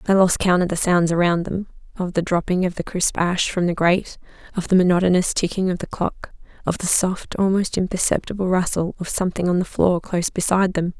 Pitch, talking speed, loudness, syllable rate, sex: 180 Hz, 215 wpm, -20 LUFS, 5.8 syllables/s, female